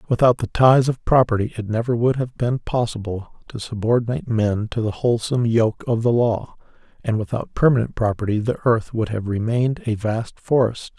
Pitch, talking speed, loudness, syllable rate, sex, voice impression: 115 Hz, 180 wpm, -20 LUFS, 5.4 syllables/s, male, masculine, middle-aged, slightly weak, slightly halting, raspy, sincere, calm, mature, friendly, reassuring, slightly wild, kind, modest